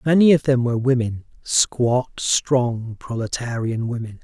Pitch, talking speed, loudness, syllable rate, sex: 125 Hz, 115 wpm, -20 LUFS, 4.2 syllables/s, male